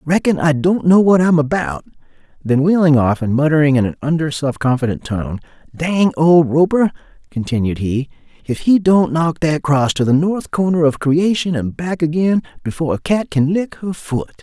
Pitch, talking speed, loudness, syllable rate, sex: 155 Hz, 185 wpm, -16 LUFS, 5.0 syllables/s, male